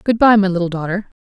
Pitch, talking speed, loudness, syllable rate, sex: 195 Hz, 245 wpm, -15 LUFS, 6.7 syllables/s, female